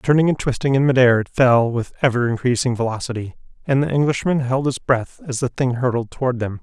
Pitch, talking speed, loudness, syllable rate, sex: 125 Hz, 210 wpm, -19 LUFS, 5.9 syllables/s, male